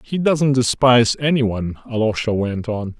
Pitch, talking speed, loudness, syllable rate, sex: 120 Hz, 160 wpm, -18 LUFS, 5.1 syllables/s, male